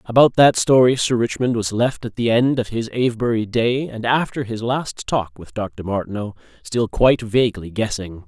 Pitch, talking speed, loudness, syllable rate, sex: 115 Hz, 190 wpm, -19 LUFS, 5.0 syllables/s, male